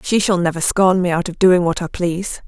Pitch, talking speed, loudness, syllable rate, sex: 180 Hz, 265 wpm, -17 LUFS, 5.6 syllables/s, female